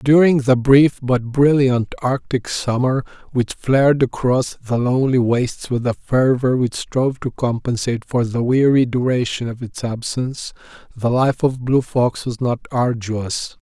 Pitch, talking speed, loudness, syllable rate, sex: 125 Hz, 155 wpm, -18 LUFS, 4.4 syllables/s, male